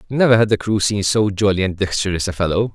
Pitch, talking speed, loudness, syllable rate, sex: 100 Hz, 240 wpm, -17 LUFS, 6.3 syllables/s, male